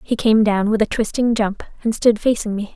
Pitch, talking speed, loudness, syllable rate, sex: 215 Hz, 240 wpm, -18 LUFS, 5.2 syllables/s, female